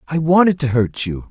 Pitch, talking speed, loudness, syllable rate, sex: 145 Hz, 230 wpm, -16 LUFS, 5.2 syllables/s, male